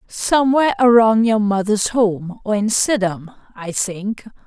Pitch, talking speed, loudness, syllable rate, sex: 215 Hz, 135 wpm, -17 LUFS, 4.1 syllables/s, female